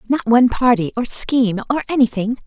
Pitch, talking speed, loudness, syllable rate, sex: 240 Hz, 170 wpm, -17 LUFS, 5.9 syllables/s, female